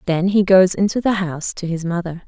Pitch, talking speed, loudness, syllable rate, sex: 180 Hz, 240 wpm, -18 LUFS, 5.7 syllables/s, female